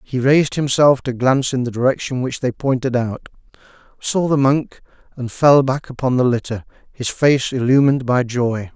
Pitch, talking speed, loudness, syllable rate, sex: 130 Hz, 180 wpm, -17 LUFS, 5.1 syllables/s, male